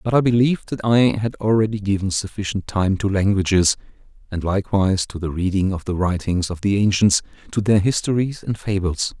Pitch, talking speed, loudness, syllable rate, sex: 100 Hz, 185 wpm, -20 LUFS, 5.6 syllables/s, male